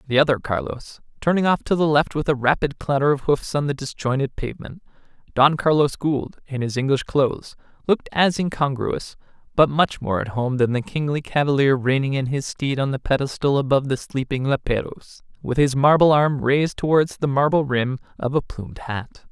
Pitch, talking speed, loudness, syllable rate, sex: 140 Hz, 185 wpm, -21 LUFS, 5.4 syllables/s, male